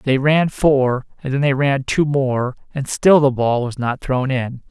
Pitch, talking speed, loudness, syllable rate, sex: 135 Hz, 215 wpm, -18 LUFS, 4.0 syllables/s, male